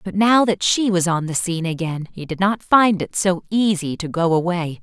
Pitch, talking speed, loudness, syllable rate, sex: 185 Hz, 235 wpm, -19 LUFS, 5.0 syllables/s, female